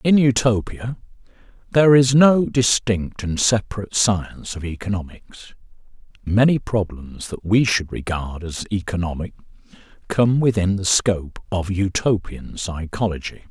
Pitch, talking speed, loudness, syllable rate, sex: 105 Hz, 115 wpm, -20 LUFS, 4.5 syllables/s, male